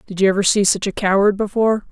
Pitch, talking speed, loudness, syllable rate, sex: 200 Hz, 250 wpm, -17 LUFS, 6.8 syllables/s, female